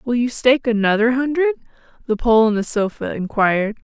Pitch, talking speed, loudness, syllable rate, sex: 235 Hz, 170 wpm, -18 LUFS, 5.5 syllables/s, female